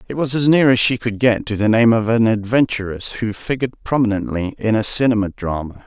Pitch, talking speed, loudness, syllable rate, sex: 115 Hz, 215 wpm, -17 LUFS, 5.7 syllables/s, male